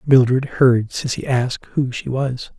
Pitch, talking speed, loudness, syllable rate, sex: 130 Hz, 165 wpm, -19 LUFS, 3.8 syllables/s, male